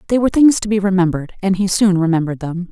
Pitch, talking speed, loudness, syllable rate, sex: 190 Hz, 245 wpm, -16 LUFS, 7.4 syllables/s, female